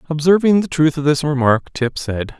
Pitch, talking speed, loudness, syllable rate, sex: 150 Hz, 200 wpm, -16 LUFS, 5.0 syllables/s, male